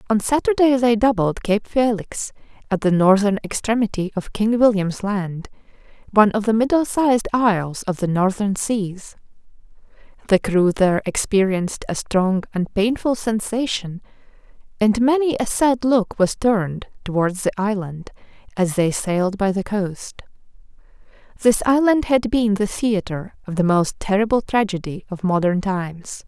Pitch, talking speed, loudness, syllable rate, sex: 205 Hz, 145 wpm, -19 LUFS, 4.7 syllables/s, female